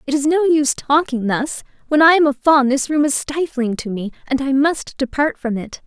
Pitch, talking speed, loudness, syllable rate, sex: 280 Hz, 235 wpm, -17 LUFS, 5.1 syllables/s, female